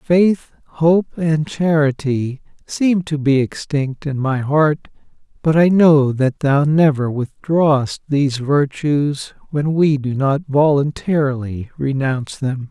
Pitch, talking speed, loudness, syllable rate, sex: 145 Hz, 130 wpm, -17 LUFS, 3.6 syllables/s, male